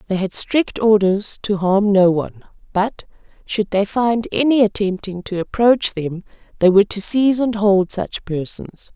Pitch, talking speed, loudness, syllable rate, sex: 205 Hz, 170 wpm, -18 LUFS, 4.5 syllables/s, female